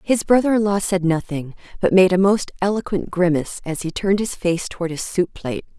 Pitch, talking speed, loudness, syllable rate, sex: 185 Hz, 220 wpm, -20 LUFS, 5.8 syllables/s, female